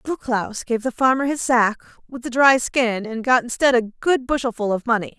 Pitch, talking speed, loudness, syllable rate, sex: 245 Hz, 220 wpm, -20 LUFS, 5.2 syllables/s, female